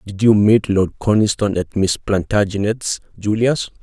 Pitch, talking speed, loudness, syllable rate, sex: 105 Hz, 140 wpm, -17 LUFS, 4.5 syllables/s, male